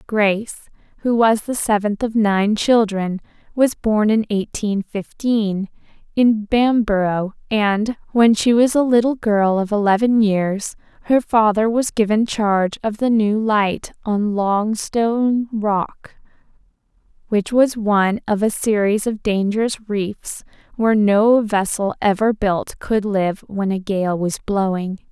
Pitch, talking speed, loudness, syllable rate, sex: 210 Hz, 140 wpm, -18 LUFS, 3.8 syllables/s, female